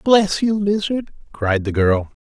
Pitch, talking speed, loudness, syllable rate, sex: 165 Hz, 160 wpm, -19 LUFS, 3.8 syllables/s, male